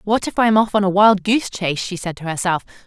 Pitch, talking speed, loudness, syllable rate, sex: 195 Hz, 295 wpm, -18 LUFS, 6.7 syllables/s, female